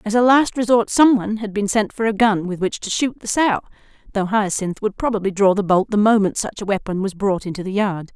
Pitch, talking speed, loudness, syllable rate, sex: 210 Hz, 260 wpm, -19 LUFS, 5.7 syllables/s, female